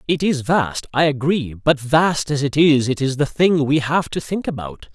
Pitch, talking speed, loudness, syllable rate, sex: 145 Hz, 230 wpm, -18 LUFS, 4.5 syllables/s, male